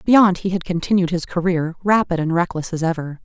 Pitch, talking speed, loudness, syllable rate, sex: 175 Hz, 205 wpm, -19 LUFS, 5.6 syllables/s, female